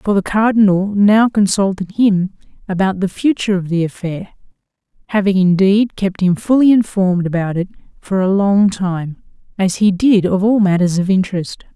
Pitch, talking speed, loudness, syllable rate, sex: 195 Hz, 165 wpm, -15 LUFS, 5.0 syllables/s, female